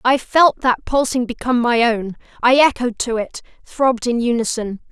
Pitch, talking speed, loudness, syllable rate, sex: 245 Hz, 170 wpm, -17 LUFS, 4.9 syllables/s, female